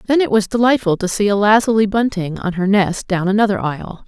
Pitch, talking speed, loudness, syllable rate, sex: 205 Hz, 220 wpm, -16 LUFS, 5.9 syllables/s, female